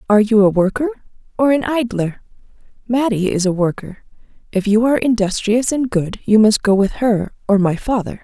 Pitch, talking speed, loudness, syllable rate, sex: 220 Hz, 180 wpm, -16 LUFS, 5.5 syllables/s, female